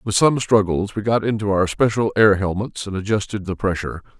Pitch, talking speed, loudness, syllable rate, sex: 100 Hz, 200 wpm, -19 LUFS, 5.6 syllables/s, male